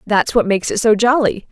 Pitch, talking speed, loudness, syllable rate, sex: 220 Hz, 235 wpm, -15 LUFS, 5.8 syllables/s, female